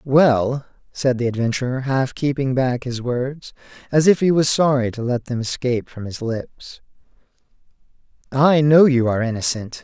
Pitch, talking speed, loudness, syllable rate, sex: 130 Hz, 160 wpm, -19 LUFS, 4.7 syllables/s, male